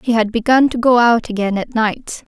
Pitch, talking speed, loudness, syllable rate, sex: 230 Hz, 230 wpm, -15 LUFS, 5.1 syllables/s, female